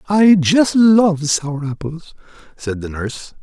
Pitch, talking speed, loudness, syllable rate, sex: 165 Hz, 140 wpm, -15 LUFS, 3.6 syllables/s, male